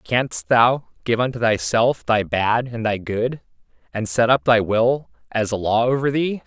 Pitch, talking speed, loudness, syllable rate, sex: 120 Hz, 185 wpm, -20 LUFS, 4.2 syllables/s, male